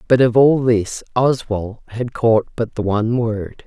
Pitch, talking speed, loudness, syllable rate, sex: 115 Hz, 180 wpm, -17 LUFS, 4.0 syllables/s, female